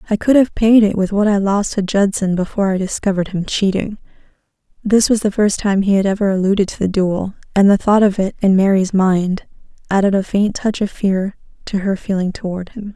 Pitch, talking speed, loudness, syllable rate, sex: 200 Hz, 220 wpm, -16 LUFS, 5.6 syllables/s, female